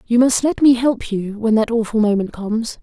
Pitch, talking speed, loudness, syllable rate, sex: 225 Hz, 235 wpm, -17 LUFS, 5.2 syllables/s, female